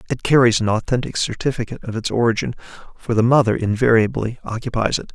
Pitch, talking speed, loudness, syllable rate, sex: 115 Hz, 165 wpm, -19 LUFS, 6.5 syllables/s, male